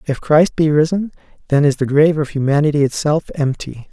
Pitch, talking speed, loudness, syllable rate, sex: 150 Hz, 185 wpm, -16 LUFS, 5.6 syllables/s, male